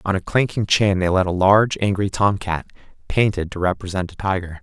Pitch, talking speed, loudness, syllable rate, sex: 95 Hz, 205 wpm, -20 LUFS, 5.6 syllables/s, male